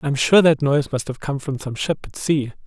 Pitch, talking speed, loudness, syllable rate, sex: 140 Hz, 295 wpm, -20 LUFS, 5.9 syllables/s, male